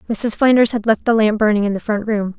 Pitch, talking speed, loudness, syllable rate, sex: 215 Hz, 275 wpm, -16 LUFS, 5.9 syllables/s, female